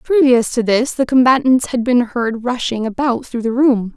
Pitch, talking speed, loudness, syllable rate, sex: 245 Hz, 195 wpm, -15 LUFS, 4.7 syllables/s, female